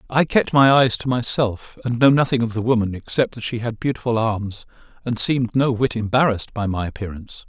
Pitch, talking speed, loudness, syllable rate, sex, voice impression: 120 Hz, 210 wpm, -20 LUFS, 5.7 syllables/s, male, masculine, adult-like, tensed, slightly weak, clear, fluent, cool, intellectual, calm, slightly friendly, wild, lively, slightly intense